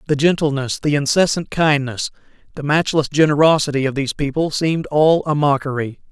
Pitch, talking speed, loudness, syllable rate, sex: 145 Hz, 145 wpm, -17 LUFS, 5.6 syllables/s, male